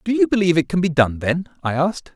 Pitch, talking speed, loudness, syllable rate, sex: 160 Hz, 280 wpm, -19 LUFS, 6.7 syllables/s, male